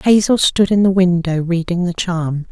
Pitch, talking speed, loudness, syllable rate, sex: 180 Hz, 190 wpm, -15 LUFS, 4.5 syllables/s, female